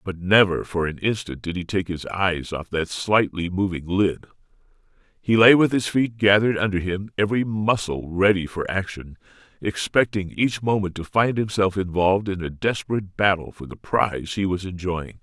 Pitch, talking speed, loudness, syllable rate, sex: 95 Hz, 175 wpm, -22 LUFS, 5.0 syllables/s, male